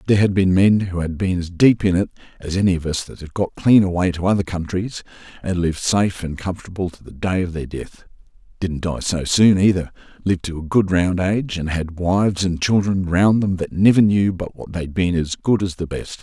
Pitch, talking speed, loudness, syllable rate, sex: 90 Hz, 230 wpm, -19 LUFS, 5.5 syllables/s, male